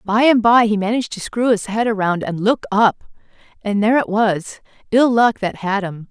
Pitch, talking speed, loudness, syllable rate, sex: 215 Hz, 215 wpm, -17 LUFS, 5.0 syllables/s, female